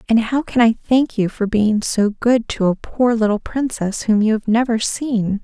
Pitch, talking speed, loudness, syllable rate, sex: 225 Hz, 220 wpm, -18 LUFS, 4.5 syllables/s, female